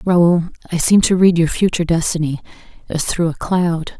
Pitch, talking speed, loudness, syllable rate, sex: 170 Hz, 180 wpm, -16 LUFS, 5.1 syllables/s, female